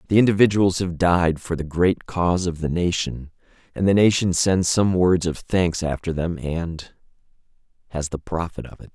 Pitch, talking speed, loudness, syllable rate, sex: 85 Hz, 175 wpm, -21 LUFS, 4.8 syllables/s, male